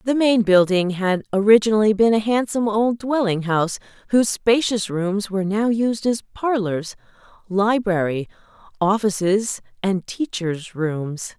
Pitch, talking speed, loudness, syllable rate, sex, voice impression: 205 Hz, 125 wpm, -20 LUFS, 4.4 syllables/s, female, feminine, middle-aged, clear, fluent, intellectual, elegant, lively, slightly strict, slightly sharp